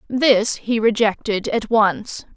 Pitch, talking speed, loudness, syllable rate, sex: 220 Hz, 125 wpm, -18 LUFS, 3.3 syllables/s, female